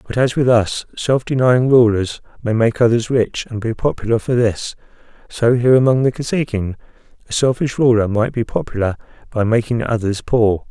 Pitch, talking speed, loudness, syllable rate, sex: 115 Hz, 175 wpm, -17 LUFS, 5.2 syllables/s, male